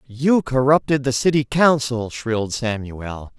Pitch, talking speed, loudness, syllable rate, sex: 130 Hz, 125 wpm, -19 LUFS, 4.0 syllables/s, male